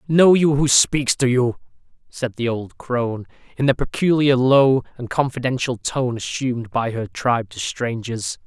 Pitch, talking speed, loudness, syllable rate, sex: 125 Hz, 165 wpm, -20 LUFS, 4.5 syllables/s, male